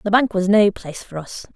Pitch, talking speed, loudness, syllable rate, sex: 200 Hz, 270 wpm, -18 LUFS, 5.8 syllables/s, female